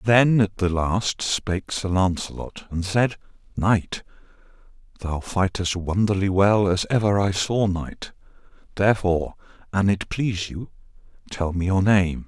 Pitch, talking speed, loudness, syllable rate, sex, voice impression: 100 Hz, 135 wpm, -22 LUFS, 4.2 syllables/s, male, masculine, adult-like, slightly thick, slightly refreshing, sincere, calm